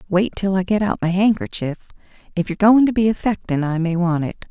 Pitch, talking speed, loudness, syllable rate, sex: 190 Hz, 225 wpm, -19 LUFS, 6.0 syllables/s, female